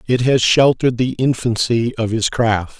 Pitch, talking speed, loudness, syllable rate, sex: 120 Hz, 170 wpm, -16 LUFS, 4.6 syllables/s, male